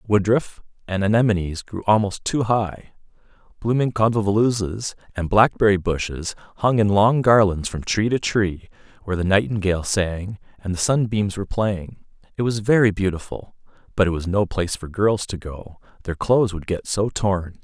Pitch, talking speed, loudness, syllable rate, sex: 100 Hz, 165 wpm, -21 LUFS, 5.1 syllables/s, male